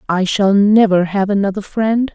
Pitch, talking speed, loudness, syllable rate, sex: 200 Hz, 170 wpm, -14 LUFS, 4.6 syllables/s, female